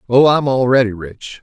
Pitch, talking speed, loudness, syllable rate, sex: 125 Hz, 170 wpm, -14 LUFS, 4.8 syllables/s, male